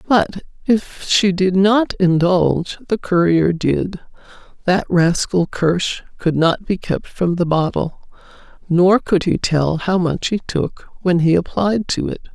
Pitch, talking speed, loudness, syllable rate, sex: 180 Hz, 150 wpm, -17 LUFS, 3.8 syllables/s, female